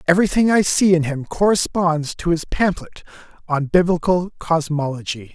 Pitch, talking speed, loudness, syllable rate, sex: 170 Hz, 135 wpm, -19 LUFS, 5.1 syllables/s, male